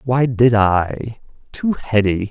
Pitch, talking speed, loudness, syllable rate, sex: 115 Hz, 130 wpm, -17 LUFS, 3.2 syllables/s, male